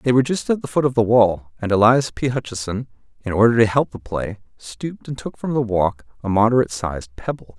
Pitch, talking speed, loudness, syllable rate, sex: 115 Hz, 230 wpm, -20 LUFS, 5.8 syllables/s, male